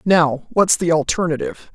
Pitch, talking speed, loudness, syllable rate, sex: 165 Hz, 140 wpm, -18 LUFS, 4.9 syllables/s, female